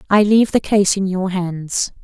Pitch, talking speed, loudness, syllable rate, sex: 195 Hz, 205 wpm, -17 LUFS, 4.6 syllables/s, female